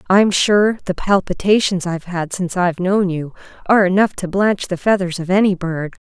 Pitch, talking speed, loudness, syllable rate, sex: 185 Hz, 190 wpm, -17 LUFS, 5.4 syllables/s, female